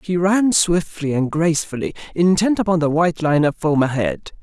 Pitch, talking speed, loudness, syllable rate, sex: 165 Hz, 175 wpm, -18 LUFS, 5.2 syllables/s, male